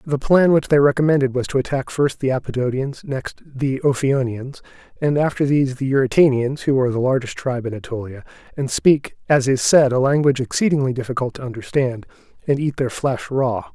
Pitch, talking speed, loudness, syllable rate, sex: 135 Hz, 185 wpm, -19 LUFS, 5.7 syllables/s, male